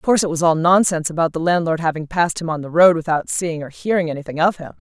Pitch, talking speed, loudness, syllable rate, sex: 165 Hz, 270 wpm, -18 LUFS, 7.0 syllables/s, female